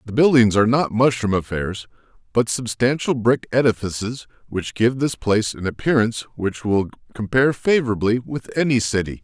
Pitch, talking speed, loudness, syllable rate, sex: 115 Hz, 150 wpm, -20 LUFS, 5.4 syllables/s, male